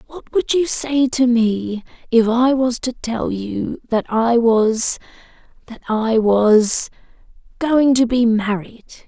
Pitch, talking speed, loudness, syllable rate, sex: 235 Hz, 130 wpm, -17 LUFS, 3.4 syllables/s, female